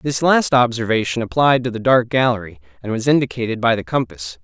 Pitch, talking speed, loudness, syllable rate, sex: 120 Hz, 190 wpm, -18 LUFS, 5.8 syllables/s, male